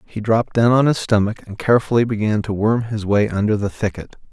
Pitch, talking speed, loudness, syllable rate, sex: 110 Hz, 220 wpm, -18 LUFS, 6.0 syllables/s, male